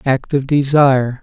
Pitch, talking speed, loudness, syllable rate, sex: 135 Hz, 145 wpm, -14 LUFS, 4.5 syllables/s, male